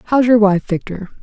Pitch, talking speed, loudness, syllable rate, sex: 210 Hz, 195 wpm, -14 LUFS, 4.6 syllables/s, female